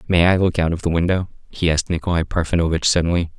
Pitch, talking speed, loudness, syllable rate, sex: 85 Hz, 215 wpm, -19 LUFS, 7.1 syllables/s, male